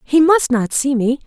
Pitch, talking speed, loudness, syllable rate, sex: 270 Hz, 235 wpm, -15 LUFS, 4.5 syllables/s, female